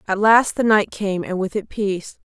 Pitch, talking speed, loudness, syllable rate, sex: 200 Hz, 240 wpm, -19 LUFS, 4.9 syllables/s, female